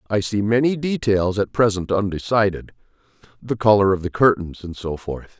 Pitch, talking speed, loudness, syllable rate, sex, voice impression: 105 Hz, 155 wpm, -20 LUFS, 5.1 syllables/s, male, masculine, adult-like, slightly powerful, slightly hard, cool, intellectual, calm, mature, slightly wild, slightly strict